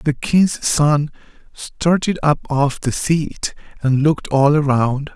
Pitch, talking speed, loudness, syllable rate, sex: 145 Hz, 140 wpm, -17 LUFS, 3.5 syllables/s, male